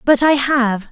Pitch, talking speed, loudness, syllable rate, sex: 260 Hz, 195 wpm, -15 LUFS, 3.8 syllables/s, female